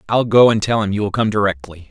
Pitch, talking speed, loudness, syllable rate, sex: 105 Hz, 285 wpm, -16 LUFS, 6.3 syllables/s, male